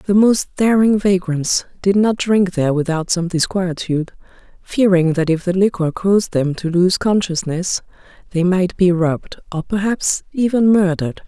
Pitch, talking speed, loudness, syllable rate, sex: 185 Hz, 155 wpm, -17 LUFS, 4.7 syllables/s, female